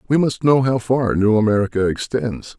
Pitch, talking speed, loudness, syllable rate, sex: 115 Hz, 185 wpm, -18 LUFS, 5.0 syllables/s, male